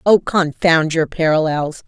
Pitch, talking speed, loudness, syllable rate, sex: 165 Hz, 130 wpm, -16 LUFS, 4.0 syllables/s, female